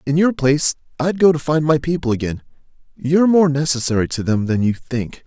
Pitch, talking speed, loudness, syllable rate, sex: 145 Hz, 205 wpm, -17 LUFS, 5.7 syllables/s, male